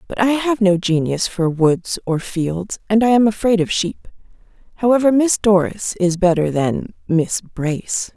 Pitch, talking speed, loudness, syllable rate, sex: 195 Hz, 160 wpm, -17 LUFS, 4.4 syllables/s, female